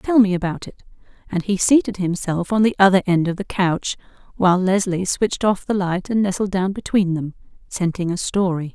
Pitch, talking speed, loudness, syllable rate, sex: 190 Hz, 200 wpm, -19 LUFS, 5.4 syllables/s, female